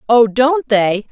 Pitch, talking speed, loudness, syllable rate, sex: 235 Hz, 160 wpm, -13 LUFS, 3.3 syllables/s, female